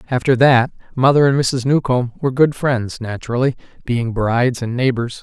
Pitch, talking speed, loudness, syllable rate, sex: 125 Hz, 160 wpm, -17 LUFS, 5.2 syllables/s, male